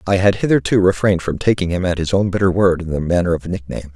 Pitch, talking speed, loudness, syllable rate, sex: 90 Hz, 275 wpm, -17 LUFS, 6.6 syllables/s, male